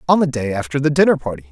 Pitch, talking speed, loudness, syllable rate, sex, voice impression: 135 Hz, 280 wpm, -17 LUFS, 7.7 syllables/s, male, masculine, adult-like, thick, tensed, powerful, hard, raspy, cool, intellectual, friendly, wild, lively, kind, slightly modest